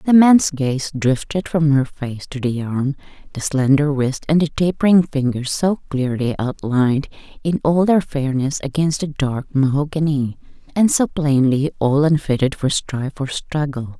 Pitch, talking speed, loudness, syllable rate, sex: 145 Hz, 160 wpm, -18 LUFS, 4.4 syllables/s, female